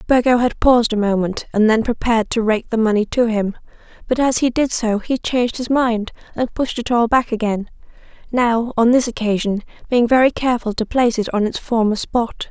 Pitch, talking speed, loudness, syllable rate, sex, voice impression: 230 Hz, 200 wpm, -18 LUFS, 5.5 syllables/s, female, feminine, slightly young, slightly relaxed, slightly weak, soft, slightly raspy, slightly cute, calm, friendly, reassuring, kind, modest